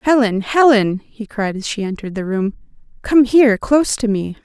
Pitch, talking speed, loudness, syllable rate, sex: 225 Hz, 190 wpm, -16 LUFS, 5.3 syllables/s, female